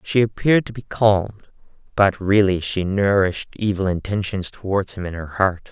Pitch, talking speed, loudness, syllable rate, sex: 100 Hz, 170 wpm, -20 LUFS, 5.3 syllables/s, male